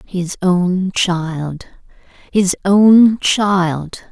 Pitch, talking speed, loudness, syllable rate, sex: 185 Hz, 90 wpm, -14 LUFS, 1.9 syllables/s, female